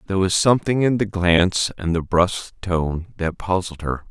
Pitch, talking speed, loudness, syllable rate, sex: 90 Hz, 190 wpm, -20 LUFS, 5.1 syllables/s, male